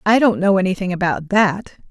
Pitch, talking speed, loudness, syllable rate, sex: 195 Hz, 190 wpm, -17 LUFS, 5.6 syllables/s, female